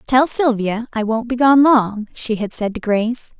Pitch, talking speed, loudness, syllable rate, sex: 235 Hz, 210 wpm, -17 LUFS, 4.5 syllables/s, female